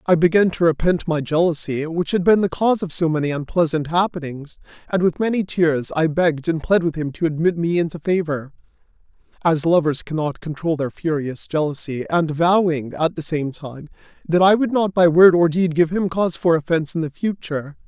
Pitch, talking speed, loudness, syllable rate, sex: 165 Hz, 200 wpm, -19 LUFS, 5.4 syllables/s, male